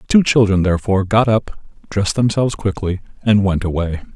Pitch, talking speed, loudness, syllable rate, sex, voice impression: 100 Hz, 175 wpm, -17 LUFS, 6.0 syllables/s, male, masculine, adult-like, slightly thick, slightly muffled, cool, sincere, slightly elegant